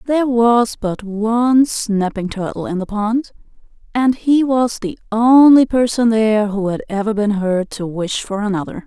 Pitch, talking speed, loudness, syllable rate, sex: 220 Hz, 170 wpm, -16 LUFS, 4.5 syllables/s, female